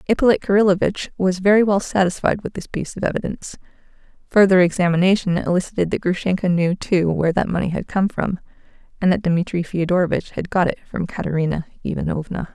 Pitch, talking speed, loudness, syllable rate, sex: 185 Hz, 165 wpm, -19 LUFS, 6.3 syllables/s, female